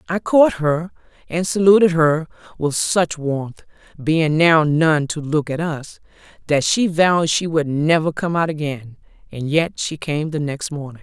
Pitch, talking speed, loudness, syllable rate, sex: 160 Hz, 175 wpm, -18 LUFS, 3.8 syllables/s, female